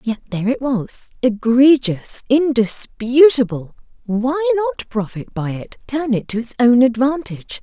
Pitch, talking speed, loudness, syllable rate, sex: 250 Hz, 135 wpm, -17 LUFS, 4.7 syllables/s, female